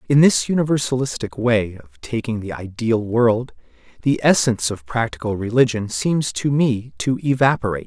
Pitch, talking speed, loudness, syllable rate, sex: 120 Hz, 145 wpm, -19 LUFS, 5.1 syllables/s, male